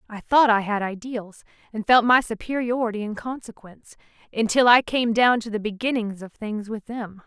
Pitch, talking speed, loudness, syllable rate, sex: 225 Hz, 180 wpm, -22 LUFS, 5.1 syllables/s, female